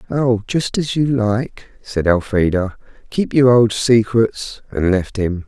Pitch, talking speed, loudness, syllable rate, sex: 115 Hz, 155 wpm, -17 LUFS, 3.7 syllables/s, male